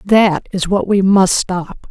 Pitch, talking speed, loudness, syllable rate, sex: 190 Hz, 190 wpm, -14 LUFS, 3.4 syllables/s, female